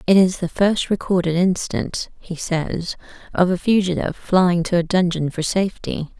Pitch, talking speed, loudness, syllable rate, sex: 175 Hz, 165 wpm, -20 LUFS, 4.8 syllables/s, female